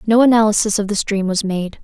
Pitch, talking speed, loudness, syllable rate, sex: 210 Hz, 230 wpm, -16 LUFS, 5.9 syllables/s, female